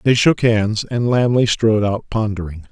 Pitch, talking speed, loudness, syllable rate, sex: 110 Hz, 175 wpm, -17 LUFS, 4.6 syllables/s, male